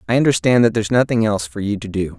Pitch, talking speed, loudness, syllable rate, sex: 115 Hz, 275 wpm, -17 LUFS, 7.4 syllables/s, male